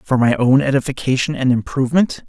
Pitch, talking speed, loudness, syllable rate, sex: 135 Hz, 160 wpm, -17 LUFS, 5.9 syllables/s, male